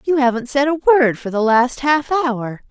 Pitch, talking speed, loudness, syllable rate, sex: 265 Hz, 220 wpm, -16 LUFS, 4.6 syllables/s, female